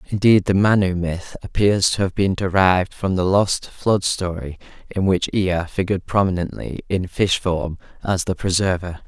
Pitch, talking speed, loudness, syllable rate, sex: 95 Hz, 165 wpm, -20 LUFS, 4.8 syllables/s, male